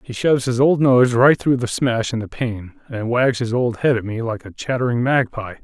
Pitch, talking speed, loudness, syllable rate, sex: 120 Hz, 245 wpm, -18 LUFS, 5.1 syllables/s, male